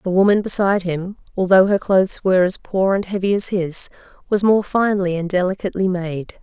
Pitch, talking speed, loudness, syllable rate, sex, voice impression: 190 Hz, 185 wpm, -18 LUFS, 5.7 syllables/s, female, very feminine, slightly young, slightly thin, relaxed, slightly weak, slightly dark, soft, slightly clear, slightly fluent, cute, intellectual, slightly refreshing, sincere, calm, very friendly, very reassuring, slightly unique, elegant, slightly wild, sweet, lively, kind, slightly intense, slightly sharp, light